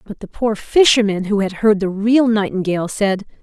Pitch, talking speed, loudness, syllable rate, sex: 210 Hz, 195 wpm, -16 LUFS, 5.1 syllables/s, female